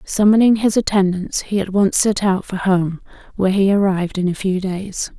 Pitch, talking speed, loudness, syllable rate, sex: 195 Hz, 195 wpm, -17 LUFS, 5.1 syllables/s, female